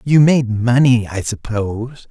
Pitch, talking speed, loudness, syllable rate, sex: 120 Hz, 140 wpm, -16 LUFS, 4.0 syllables/s, male